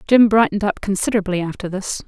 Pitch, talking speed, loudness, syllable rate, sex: 200 Hz, 175 wpm, -18 LUFS, 6.7 syllables/s, female